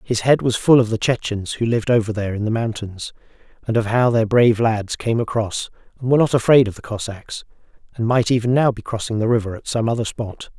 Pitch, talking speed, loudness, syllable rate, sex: 115 Hz, 230 wpm, -19 LUFS, 6.0 syllables/s, male